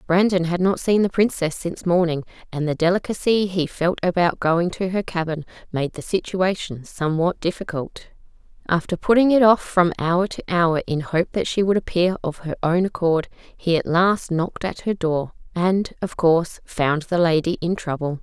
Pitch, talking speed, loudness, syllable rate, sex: 175 Hz, 185 wpm, -21 LUFS, 4.9 syllables/s, female